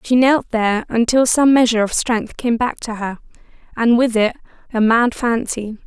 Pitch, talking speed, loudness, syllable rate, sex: 235 Hz, 185 wpm, -17 LUFS, 4.9 syllables/s, female